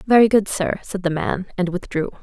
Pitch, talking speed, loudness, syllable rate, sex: 190 Hz, 215 wpm, -20 LUFS, 5.4 syllables/s, female